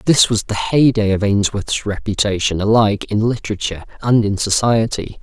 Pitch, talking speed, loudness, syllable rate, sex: 105 Hz, 150 wpm, -17 LUFS, 5.2 syllables/s, male